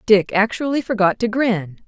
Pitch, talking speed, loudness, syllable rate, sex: 215 Hz, 160 wpm, -18 LUFS, 4.7 syllables/s, female